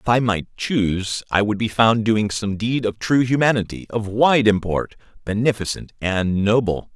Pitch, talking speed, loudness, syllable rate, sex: 110 Hz, 175 wpm, -20 LUFS, 4.5 syllables/s, male